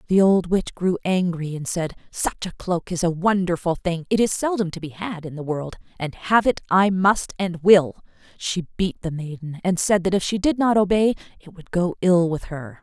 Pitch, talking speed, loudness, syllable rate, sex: 180 Hz, 225 wpm, -22 LUFS, 4.9 syllables/s, female